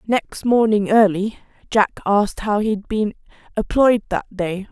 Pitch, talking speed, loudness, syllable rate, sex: 210 Hz, 140 wpm, -19 LUFS, 4.5 syllables/s, female